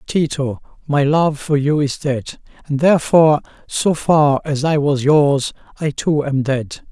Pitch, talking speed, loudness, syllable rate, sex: 145 Hz, 165 wpm, -17 LUFS, 4.1 syllables/s, male